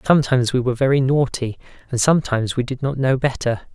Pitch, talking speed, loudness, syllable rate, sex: 130 Hz, 190 wpm, -19 LUFS, 6.9 syllables/s, male